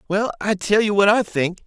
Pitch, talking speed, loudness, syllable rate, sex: 200 Hz, 255 wpm, -19 LUFS, 5.3 syllables/s, male